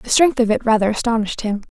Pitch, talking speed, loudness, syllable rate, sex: 225 Hz, 245 wpm, -17 LUFS, 6.8 syllables/s, female